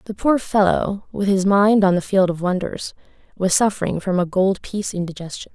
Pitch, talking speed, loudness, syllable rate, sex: 195 Hz, 195 wpm, -19 LUFS, 5.3 syllables/s, female